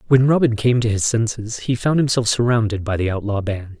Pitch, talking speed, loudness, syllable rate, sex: 115 Hz, 220 wpm, -19 LUFS, 5.6 syllables/s, male